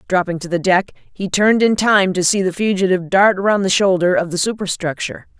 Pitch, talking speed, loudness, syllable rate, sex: 190 Hz, 210 wpm, -16 LUFS, 5.7 syllables/s, female